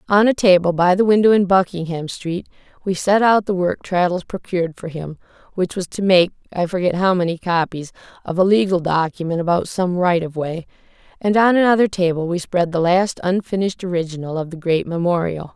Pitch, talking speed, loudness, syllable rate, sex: 180 Hz, 185 wpm, -18 LUFS, 5.6 syllables/s, female